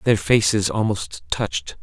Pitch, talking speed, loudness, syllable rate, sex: 100 Hz, 130 wpm, -21 LUFS, 4.0 syllables/s, male